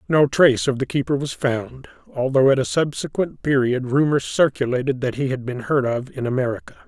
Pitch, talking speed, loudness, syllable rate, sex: 135 Hz, 190 wpm, -20 LUFS, 5.5 syllables/s, male